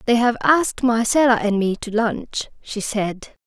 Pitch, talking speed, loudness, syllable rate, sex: 230 Hz, 175 wpm, -20 LUFS, 4.3 syllables/s, female